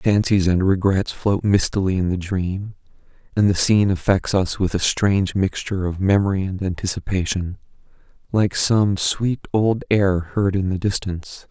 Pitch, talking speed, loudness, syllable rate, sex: 95 Hz, 155 wpm, -20 LUFS, 4.7 syllables/s, male